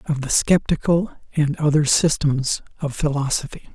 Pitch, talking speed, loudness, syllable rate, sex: 150 Hz, 130 wpm, -20 LUFS, 4.8 syllables/s, male